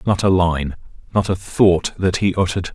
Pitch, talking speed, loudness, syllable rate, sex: 90 Hz, 195 wpm, -18 LUFS, 5.1 syllables/s, male